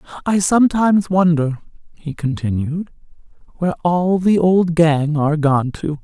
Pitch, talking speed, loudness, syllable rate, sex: 165 Hz, 130 wpm, -17 LUFS, 4.8 syllables/s, male